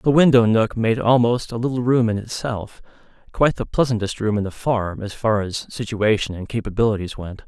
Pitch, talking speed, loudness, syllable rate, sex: 115 Hz, 195 wpm, -20 LUFS, 5.4 syllables/s, male